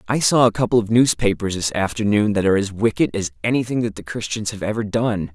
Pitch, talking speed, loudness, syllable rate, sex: 110 Hz, 225 wpm, -20 LUFS, 6.1 syllables/s, male